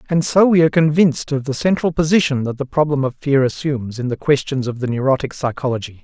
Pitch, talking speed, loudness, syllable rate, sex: 140 Hz, 220 wpm, -17 LUFS, 6.4 syllables/s, male